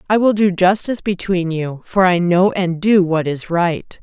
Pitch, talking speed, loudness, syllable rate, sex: 180 Hz, 210 wpm, -16 LUFS, 4.5 syllables/s, female